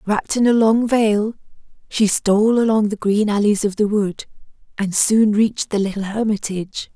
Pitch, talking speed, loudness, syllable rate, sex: 210 Hz, 175 wpm, -18 LUFS, 5.0 syllables/s, female